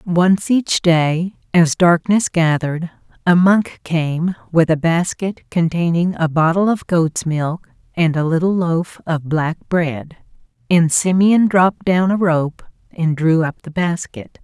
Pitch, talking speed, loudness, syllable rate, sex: 170 Hz, 150 wpm, -17 LUFS, 3.8 syllables/s, female